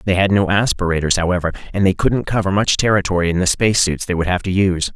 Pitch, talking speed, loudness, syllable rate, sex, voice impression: 95 Hz, 230 wpm, -17 LUFS, 6.7 syllables/s, male, very masculine, adult-like, slightly middle-aged, thick, very tensed, slightly powerful, very bright, clear, fluent, very cool, very intellectual, refreshing, sincere, calm, slightly mature, friendly, sweet, lively, kind